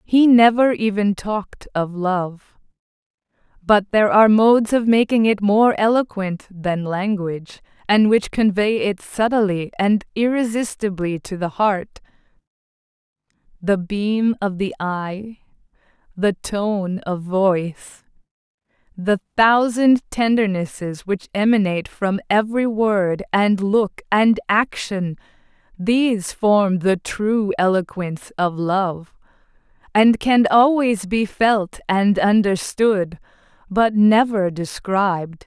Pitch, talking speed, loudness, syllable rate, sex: 205 Hz, 110 wpm, -18 LUFS, 3.8 syllables/s, female